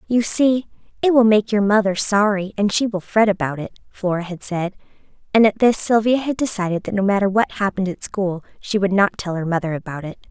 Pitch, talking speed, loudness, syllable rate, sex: 200 Hz, 220 wpm, -19 LUFS, 5.7 syllables/s, female